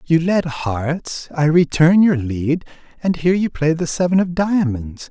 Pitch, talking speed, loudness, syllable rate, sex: 160 Hz, 175 wpm, -18 LUFS, 4.2 syllables/s, male